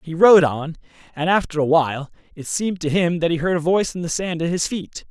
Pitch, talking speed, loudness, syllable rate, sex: 170 Hz, 260 wpm, -19 LUFS, 6.0 syllables/s, male